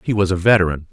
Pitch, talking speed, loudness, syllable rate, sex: 95 Hz, 260 wpm, -16 LUFS, 7.5 syllables/s, male